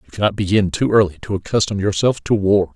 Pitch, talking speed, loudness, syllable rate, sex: 100 Hz, 220 wpm, -18 LUFS, 6.2 syllables/s, male